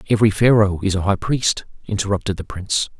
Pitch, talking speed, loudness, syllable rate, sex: 100 Hz, 180 wpm, -19 LUFS, 6.3 syllables/s, male